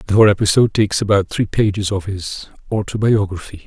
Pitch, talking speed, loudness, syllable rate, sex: 100 Hz, 165 wpm, -17 LUFS, 6.4 syllables/s, male